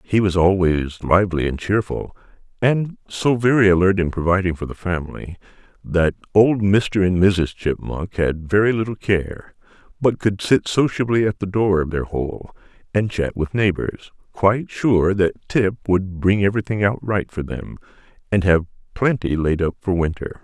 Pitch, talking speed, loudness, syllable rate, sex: 95 Hz, 165 wpm, -19 LUFS, 4.7 syllables/s, male